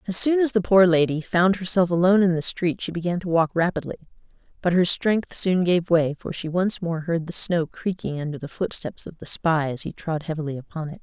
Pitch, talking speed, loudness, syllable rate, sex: 175 Hz, 235 wpm, -22 LUFS, 5.5 syllables/s, female